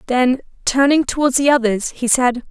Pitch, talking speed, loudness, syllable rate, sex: 255 Hz, 165 wpm, -16 LUFS, 4.9 syllables/s, female